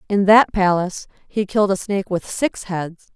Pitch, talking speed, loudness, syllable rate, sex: 195 Hz, 190 wpm, -19 LUFS, 5.1 syllables/s, female